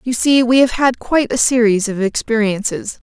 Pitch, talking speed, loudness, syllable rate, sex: 235 Hz, 195 wpm, -15 LUFS, 5.2 syllables/s, female